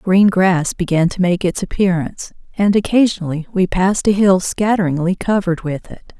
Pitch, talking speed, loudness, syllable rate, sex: 185 Hz, 165 wpm, -16 LUFS, 5.3 syllables/s, female